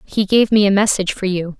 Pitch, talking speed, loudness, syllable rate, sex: 200 Hz, 265 wpm, -15 LUFS, 7.0 syllables/s, female